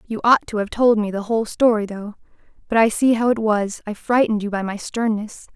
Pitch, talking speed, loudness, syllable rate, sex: 220 Hz, 225 wpm, -19 LUFS, 5.8 syllables/s, female